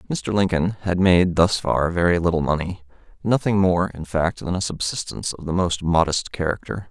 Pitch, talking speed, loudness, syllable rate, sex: 90 Hz, 175 wpm, -21 LUFS, 5.1 syllables/s, male